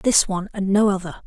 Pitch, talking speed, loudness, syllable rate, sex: 195 Hz, 240 wpm, -20 LUFS, 6.4 syllables/s, female